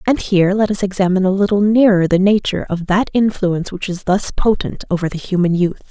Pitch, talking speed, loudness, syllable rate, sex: 195 Hz, 215 wpm, -16 LUFS, 6.2 syllables/s, female